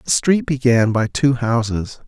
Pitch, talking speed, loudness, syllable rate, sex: 120 Hz, 175 wpm, -17 LUFS, 4.0 syllables/s, male